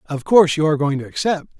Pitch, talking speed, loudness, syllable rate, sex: 155 Hz, 265 wpm, -17 LUFS, 7.0 syllables/s, male